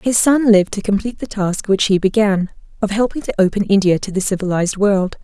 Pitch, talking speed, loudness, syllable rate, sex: 200 Hz, 220 wpm, -16 LUFS, 6.0 syllables/s, female